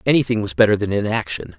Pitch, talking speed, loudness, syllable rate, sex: 110 Hz, 190 wpm, -19 LUFS, 6.9 syllables/s, male